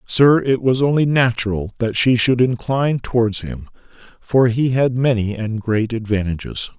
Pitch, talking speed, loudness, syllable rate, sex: 120 Hz, 160 wpm, -18 LUFS, 4.7 syllables/s, male